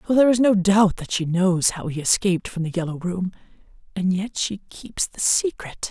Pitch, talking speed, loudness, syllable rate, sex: 190 Hz, 215 wpm, -21 LUFS, 5.1 syllables/s, female